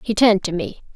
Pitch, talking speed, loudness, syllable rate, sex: 200 Hz, 250 wpm, -18 LUFS, 6.9 syllables/s, female